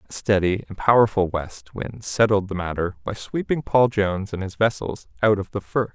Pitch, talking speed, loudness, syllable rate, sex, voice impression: 100 Hz, 200 wpm, -22 LUFS, 5.1 syllables/s, male, masculine, adult-like, tensed, bright, fluent, slightly cool, intellectual, sincere, friendly, reassuring, slightly wild, kind, slightly modest